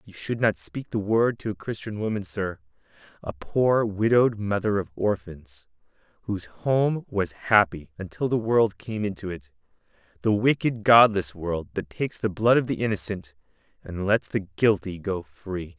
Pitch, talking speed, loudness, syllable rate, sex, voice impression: 100 Hz, 165 wpm, -25 LUFS, 4.6 syllables/s, male, masculine, adult-like, clear, fluent, cool, intellectual, sincere, calm, slightly friendly, wild, kind